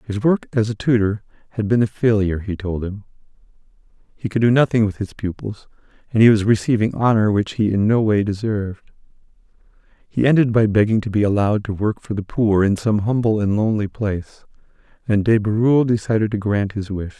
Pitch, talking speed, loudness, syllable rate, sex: 105 Hz, 195 wpm, -19 LUFS, 5.8 syllables/s, male